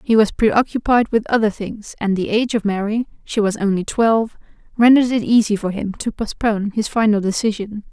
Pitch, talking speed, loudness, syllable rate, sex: 215 Hz, 175 wpm, -18 LUFS, 5.6 syllables/s, female